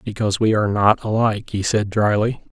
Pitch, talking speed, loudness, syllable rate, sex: 105 Hz, 190 wpm, -19 LUFS, 6.0 syllables/s, male